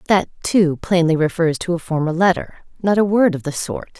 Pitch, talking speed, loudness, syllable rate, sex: 170 Hz, 195 wpm, -18 LUFS, 5.2 syllables/s, female